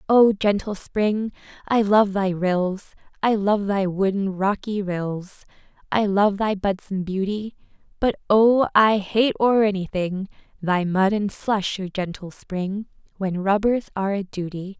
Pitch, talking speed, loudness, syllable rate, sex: 200 Hz, 145 wpm, -22 LUFS, 4.1 syllables/s, female